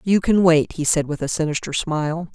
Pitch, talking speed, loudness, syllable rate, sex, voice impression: 165 Hz, 230 wpm, -20 LUFS, 5.5 syllables/s, female, very feminine, adult-like, slightly middle-aged, slightly thin, tensed, slightly powerful, slightly bright, slightly soft, slightly clear, fluent, cool, very intellectual, refreshing, sincere, calm, friendly, reassuring, slightly unique, slightly elegant, wild, slightly sweet, lively, slightly strict, slightly intense, slightly sharp